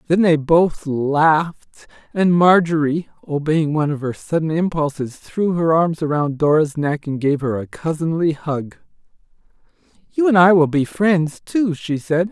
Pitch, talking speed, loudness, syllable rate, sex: 160 Hz, 160 wpm, -18 LUFS, 4.4 syllables/s, male